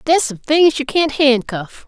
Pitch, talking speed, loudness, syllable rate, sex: 275 Hz, 190 wpm, -15 LUFS, 4.6 syllables/s, female